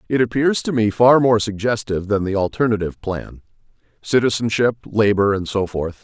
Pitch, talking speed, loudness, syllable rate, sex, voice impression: 110 Hz, 150 wpm, -18 LUFS, 5.4 syllables/s, male, masculine, adult-like, slightly powerful, slightly hard, cool, intellectual, calm, mature, slightly wild, slightly strict